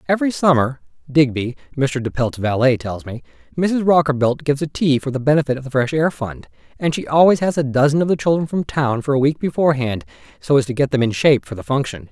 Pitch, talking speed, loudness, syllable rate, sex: 140 Hz, 235 wpm, -18 LUFS, 6.2 syllables/s, male